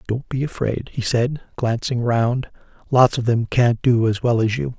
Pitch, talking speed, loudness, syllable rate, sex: 120 Hz, 200 wpm, -20 LUFS, 4.4 syllables/s, male